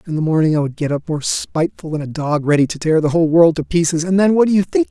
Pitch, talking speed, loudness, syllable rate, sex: 165 Hz, 320 wpm, -16 LUFS, 6.8 syllables/s, male